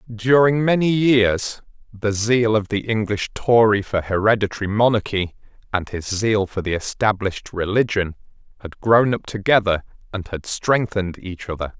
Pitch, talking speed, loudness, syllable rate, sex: 105 Hz, 140 wpm, -20 LUFS, 4.7 syllables/s, male